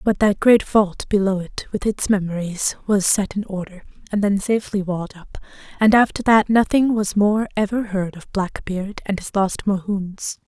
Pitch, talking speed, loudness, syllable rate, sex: 200 Hz, 185 wpm, -20 LUFS, 4.9 syllables/s, female